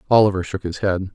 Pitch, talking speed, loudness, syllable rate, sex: 95 Hz, 210 wpm, -20 LUFS, 6.6 syllables/s, male